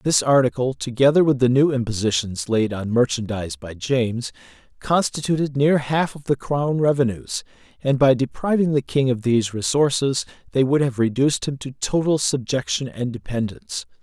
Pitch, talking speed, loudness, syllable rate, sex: 130 Hz, 160 wpm, -21 LUFS, 5.2 syllables/s, male